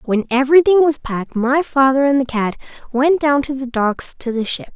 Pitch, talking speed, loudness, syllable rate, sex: 265 Hz, 215 wpm, -16 LUFS, 5.2 syllables/s, female